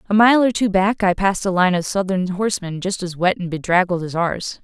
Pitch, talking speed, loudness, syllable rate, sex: 190 Hz, 245 wpm, -19 LUFS, 5.6 syllables/s, female